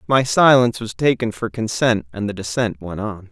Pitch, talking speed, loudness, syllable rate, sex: 110 Hz, 200 wpm, -19 LUFS, 5.2 syllables/s, male